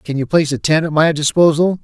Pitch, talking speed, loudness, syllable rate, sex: 155 Hz, 260 wpm, -14 LUFS, 6.2 syllables/s, male